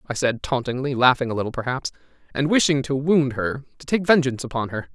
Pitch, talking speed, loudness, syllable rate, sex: 135 Hz, 205 wpm, -22 LUFS, 6.1 syllables/s, male